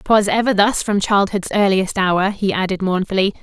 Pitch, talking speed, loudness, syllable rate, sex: 195 Hz, 175 wpm, -17 LUFS, 4.9 syllables/s, female